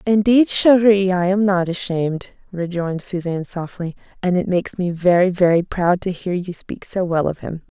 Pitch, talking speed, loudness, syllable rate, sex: 180 Hz, 185 wpm, -19 LUFS, 5.0 syllables/s, female